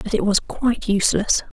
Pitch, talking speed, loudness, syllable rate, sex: 210 Hz, 190 wpm, -20 LUFS, 5.6 syllables/s, female